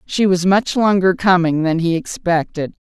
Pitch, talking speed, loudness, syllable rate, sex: 180 Hz, 165 wpm, -16 LUFS, 4.5 syllables/s, female